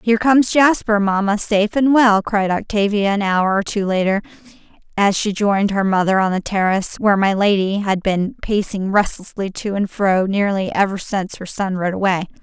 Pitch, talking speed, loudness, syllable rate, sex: 200 Hz, 190 wpm, -17 LUFS, 5.3 syllables/s, female